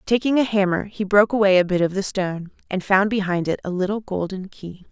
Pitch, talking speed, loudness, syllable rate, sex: 195 Hz, 230 wpm, -21 LUFS, 6.0 syllables/s, female